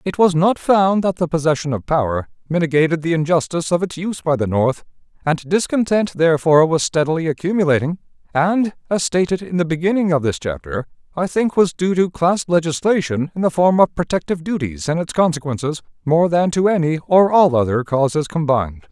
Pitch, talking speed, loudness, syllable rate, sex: 165 Hz, 185 wpm, -18 LUFS, 5.7 syllables/s, male